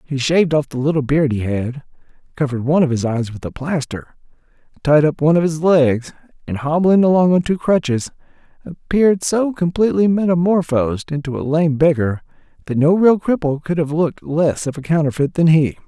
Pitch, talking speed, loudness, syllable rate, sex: 155 Hz, 185 wpm, -17 LUFS, 5.6 syllables/s, male